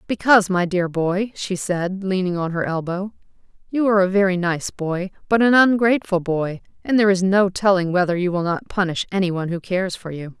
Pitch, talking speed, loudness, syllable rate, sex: 185 Hz, 210 wpm, -20 LUFS, 5.6 syllables/s, female